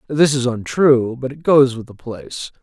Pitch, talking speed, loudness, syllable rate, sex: 130 Hz, 205 wpm, -16 LUFS, 4.8 syllables/s, male